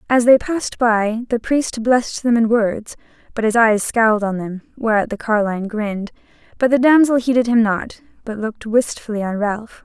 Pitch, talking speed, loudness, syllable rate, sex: 225 Hz, 190 wpm, -17 LUFS, 5.1 syllables/s, female